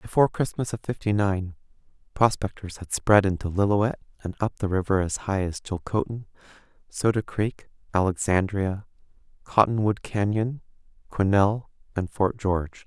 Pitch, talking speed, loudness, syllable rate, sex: 100 Hz, 125 wpm, -25 LUFS, 4.8 syllables/s, male